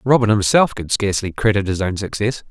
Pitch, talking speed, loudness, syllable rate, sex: 105 Hz, 190 wpm, -18 LUFS, 5.9 syllables/s, male